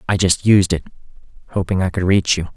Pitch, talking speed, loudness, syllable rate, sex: 95 Hz, 210 wpm, -17 LUFS, 6.1 syllables/s, male